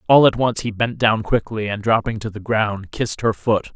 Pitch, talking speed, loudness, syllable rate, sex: 110 Hz, 240 wpm, -19 LUFS, 5.0 syllables/s, male